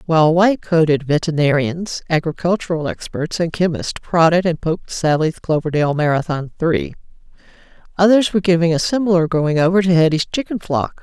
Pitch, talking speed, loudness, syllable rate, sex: 165 Hz, 140 wpm, -17 LUFS, 5.7 syllables/s, female